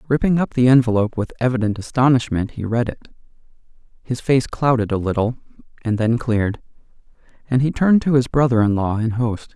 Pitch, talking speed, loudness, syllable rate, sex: 120 Hz, 175 wpm, -19 LUFS, 5.9 syllables/s, male